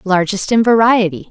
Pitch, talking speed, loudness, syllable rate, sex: 205 Hz, 140 wpm, -13 LUFS, 5.0 syllables/s, female